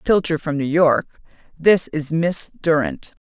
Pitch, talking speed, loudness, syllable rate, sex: 160 Hz, 130 wpm, -19 LUFS, 3.9 syllables/s, female